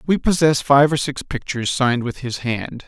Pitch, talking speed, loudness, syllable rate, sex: 135 Hz, 210 wpm, -19 LUFS, 5.1 syllables/s, male